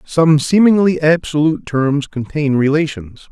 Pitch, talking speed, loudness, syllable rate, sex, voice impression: 150 Hz, 110 wpm, -14 LUFS, 4.4 syllables/s, male, masculine, adult-like, slightly thick, tensed, slightly soft, clear, cool, intellectual, calm, friendly, reassuring, wild, lively, slightly kind